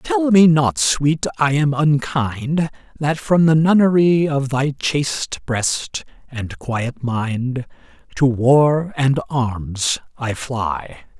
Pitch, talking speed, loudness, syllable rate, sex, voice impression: 140 Hz, 130 wpm, -18 LUFS, 3.0 syllables/s, male, masculine, very middle-aged, slightly thick, unique, slightly kind